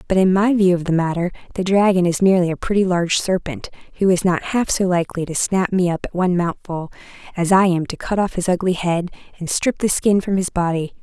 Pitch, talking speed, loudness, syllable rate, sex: 185 Hz, 240 wpm, -18 LUFS, 6.0 syllables/s, female